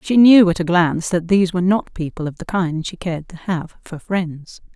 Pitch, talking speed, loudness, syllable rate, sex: 175 Hz, 240 wpm, -18 LUFS, 5.3 syllables/s, female